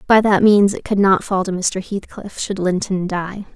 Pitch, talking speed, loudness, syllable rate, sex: 195 Hz, 220 wpm, -17 LUFS, 4.5 syllables/s, female